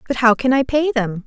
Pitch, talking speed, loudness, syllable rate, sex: 250 Hz, 285 wpm, -17 LUFS, 5.4 syllables/s, female